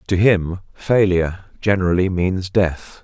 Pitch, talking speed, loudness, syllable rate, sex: 95 Hz, 120 wpm, -18 LUFS, 4.2 syllables/s, male